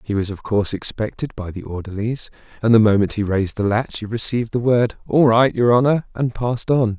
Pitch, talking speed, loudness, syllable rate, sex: 110 Hz, 225 wpm, -19 LUFS, 5.8 syllables/s, male